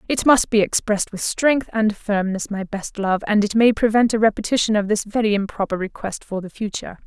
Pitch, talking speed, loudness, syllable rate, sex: 210 Hz, 210 wpm, -20 LUFS, 5.6 syllables/s, female